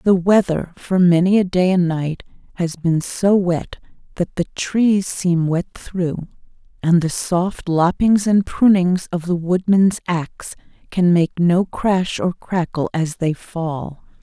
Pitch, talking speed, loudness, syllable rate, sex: 175 Hz, 155 wpm, -18 LUFS, 3.7 syllables/s, female